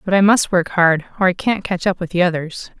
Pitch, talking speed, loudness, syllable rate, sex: 180 Hz, 280 wpm, -17 LUFS, 5.7 syllables/s, female